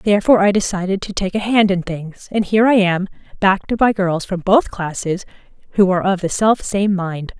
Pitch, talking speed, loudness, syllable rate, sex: 195 Hz, 210 wpm, -17 LUFS, 5.4 syllables/s, female